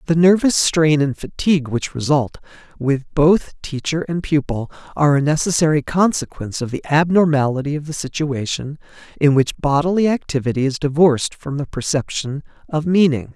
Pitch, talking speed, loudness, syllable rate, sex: 150 Hz, 150 wpm, -18 LUFS, 5.3 syllables/s, male